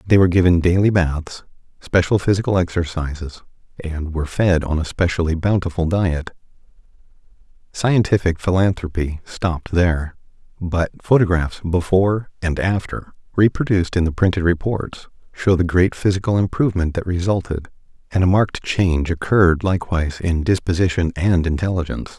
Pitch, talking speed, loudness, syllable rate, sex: 90 Hz, 125 wpm, -19 LUFS, 5.4 syllables/s, male